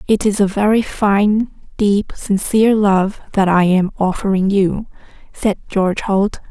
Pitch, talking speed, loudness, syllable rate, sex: 200 Hz, 150 wpm, -16 LUFS, 4.2 syllables/s, female